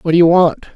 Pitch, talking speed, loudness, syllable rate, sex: 170 Hz, 315 wpm, -12 LUFS, 6.3 syllables/s, male